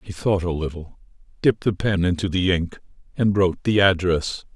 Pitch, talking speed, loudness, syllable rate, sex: 90 Hz, 185 wpm, -21 LUFS, 5.4 syllables/s, male